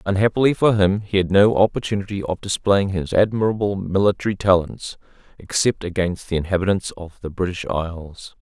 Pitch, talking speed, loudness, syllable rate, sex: 95 Hz, 150 wpm, -20 LUFS, 5.5 syllables/s, male